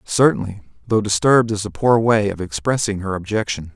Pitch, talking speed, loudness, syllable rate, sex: 100 Hz, 160 wpm, -18 LUFS, 5.6 syllables/s, male